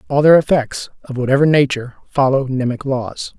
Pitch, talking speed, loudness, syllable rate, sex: 135 Hz, 160 wpm, -16 LUFS, 5.5 syllables/s, male